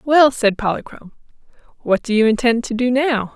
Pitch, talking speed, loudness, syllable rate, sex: 235 Hz, 180 wpm, -17 LUFS, 5.3 syllables/s, female